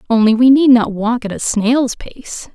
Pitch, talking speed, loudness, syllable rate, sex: 235 Hz, 210 wpm, -13 LUFS, 4.3 syllables/s, female